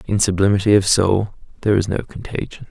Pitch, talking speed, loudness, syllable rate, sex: 100 Hz, 175 wpm, -18 LUFS, 6.1 syllables/s, male